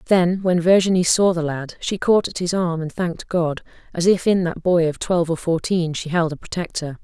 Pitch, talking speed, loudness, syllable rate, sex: 170 Hz, 230 wpm, -20 LUFS, 5.3 syllables/s, female